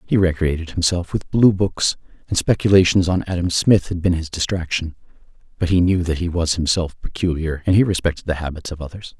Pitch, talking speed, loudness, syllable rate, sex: 85 Hz, 190 wpm, -19 LUFS, 5.7 syllables/s, male